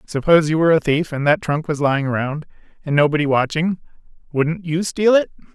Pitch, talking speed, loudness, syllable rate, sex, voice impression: 155 Hz, 185 wpm, -18 LUFS, 6.0 syllables/s, male, masculine, adult-like, tensed, powerful, bright, clear, fluent, intellectual, slightly refreshing, calm, friendly, reassuring, kind, slightly modest